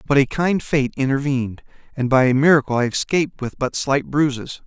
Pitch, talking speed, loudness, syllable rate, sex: 135 Hz, 195 wpm, -19 LUFS, 5.5 syllables/s, male